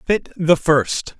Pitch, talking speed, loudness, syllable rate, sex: 160 Hz, 150 wpm, -18 LUFS, 2.9 syllables/s, male